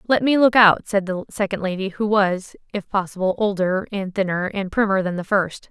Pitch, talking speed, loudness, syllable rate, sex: 195 Hz, 210 wpm, -20 LUFS, 5.1 syllables/s, female